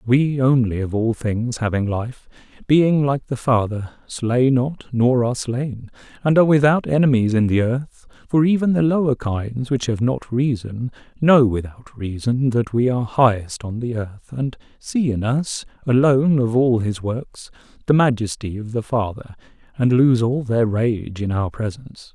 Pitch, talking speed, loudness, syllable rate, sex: 125 Hz, 175 wpm, -19 LUFS, 4.4 syllables/s, male